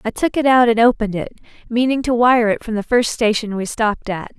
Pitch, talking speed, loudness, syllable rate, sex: 230 Hz, 245 wpm, -17 LUFS, 5.9 syllables/s, female